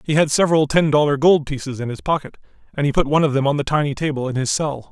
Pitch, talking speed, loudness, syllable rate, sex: 145 Hz, 280 wpm, -19 LUFS, 7.0 syllables/s, male